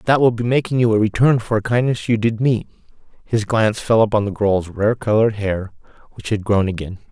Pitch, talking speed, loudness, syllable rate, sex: 110 Hz, 220 wpm, -18 LUFS, 5.7 syllables/s, male